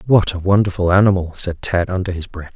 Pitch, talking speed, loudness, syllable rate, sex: 90 Hz, 210 wpm, -17 LUFS, 5.9 syllables/s, male